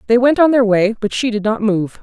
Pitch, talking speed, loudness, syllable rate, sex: 225 Hz, 295 wpm, -15 LUFS, 5.6 syllables/s, female